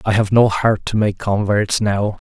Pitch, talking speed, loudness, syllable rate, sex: 105 Hz, 210 wpm, -17 LUFS, 4.3 syllables/s, male